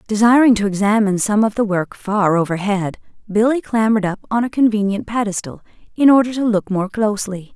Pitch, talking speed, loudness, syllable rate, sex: 210 Hz, 175 wpm, -17 LUFS, 5.8 syllables/s, female